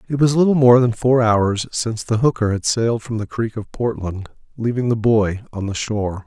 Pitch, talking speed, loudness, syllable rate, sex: 115 Hz, 220 wpm, -18 LUFS, 5.3 syllables/s, male